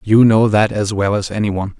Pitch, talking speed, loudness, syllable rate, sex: 105 Hz, 270 wpm, -15 LUFS, 5.9 syllables/s, male